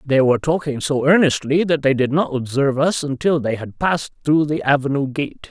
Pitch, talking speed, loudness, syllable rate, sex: 140 Hz, 205 wpm, -18 LUFS, 5.5 syllables/s, male